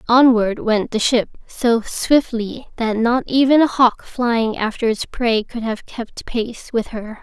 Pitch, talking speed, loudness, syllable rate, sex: 235 Hz, 175 wpm, -18 LUFS, 3.7 syllables/s, female